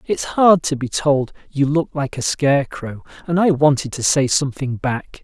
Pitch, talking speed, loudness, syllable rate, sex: 140 Hz, 195 wpm, -18 LUFS, 4.6 syllables/s, male